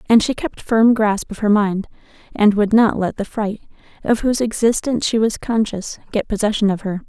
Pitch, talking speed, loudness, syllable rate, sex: 215 Hz, 205 wpm, -18 LUFS, 5.3 syllables/s, female